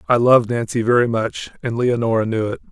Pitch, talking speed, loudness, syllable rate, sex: 115 Hz, 175 wpm, -18 LUFS, 6.0 syllables/s, male